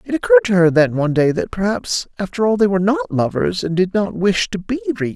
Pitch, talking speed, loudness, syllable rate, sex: 195 Hz, 255 wpm, -17 LUFS, 6.5 syllables/s, female